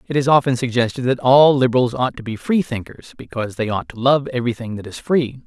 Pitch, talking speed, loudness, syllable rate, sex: 125 Hz, 220 wpm, -18 LUFS, 6.1 syllables/s, male